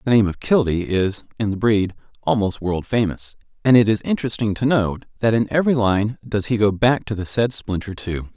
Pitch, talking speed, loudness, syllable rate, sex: 110 Hz, 215 wpm, -20 LUFS, 5.3 syllables/s, male